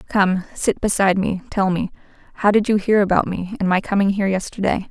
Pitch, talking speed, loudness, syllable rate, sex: 195 Hz, 210 wpm, -19 LUFS, 5.9 syllables/s, female